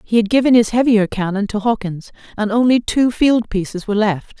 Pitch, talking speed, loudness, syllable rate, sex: 220 Hz, 205 wpm, -16 LUFS, 5.4 syllables/s, female